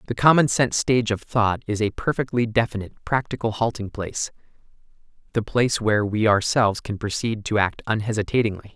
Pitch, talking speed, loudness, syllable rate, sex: 110 Hz, 160 wpm, -22 LUFS, 6.1 syllables/s, male